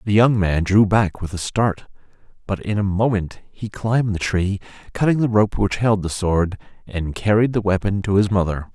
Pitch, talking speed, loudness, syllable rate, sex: 100 Hz, 205 wpm, -20 LUFS, 4.9 syllables/s, male